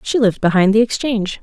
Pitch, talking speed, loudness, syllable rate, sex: 215 Hz, 210 wpm, -15 LUFS, 6.8 syllables/s, female